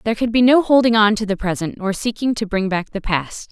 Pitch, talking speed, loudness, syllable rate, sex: 210 Hz, 275 wpm, -18 LUFS, 5.9 syllables/s, female